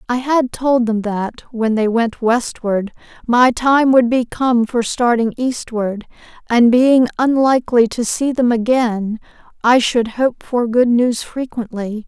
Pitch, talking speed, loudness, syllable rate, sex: 240 Hz, 155 wpm, -16 LUFS, 3.8 syllables/s, female